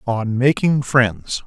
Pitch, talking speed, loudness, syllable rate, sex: 120 Hz, 125 wpm, -18 LUFS, 3.0 syllables/s, male